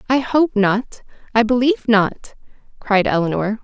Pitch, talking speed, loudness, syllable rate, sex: 230 Hz, 130 wpm, -17 LUFS, 4.8 syllables/s, female